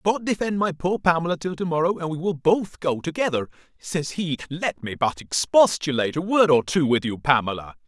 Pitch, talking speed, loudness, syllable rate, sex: 165 Hz, 200 wpm, -23 LUFS, 5.5 syllables/s, male